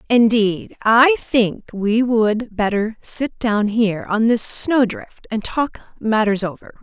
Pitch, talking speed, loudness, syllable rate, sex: 225 Hz, 140 wpm, -18 LUFS, 3.7 syllables/s, female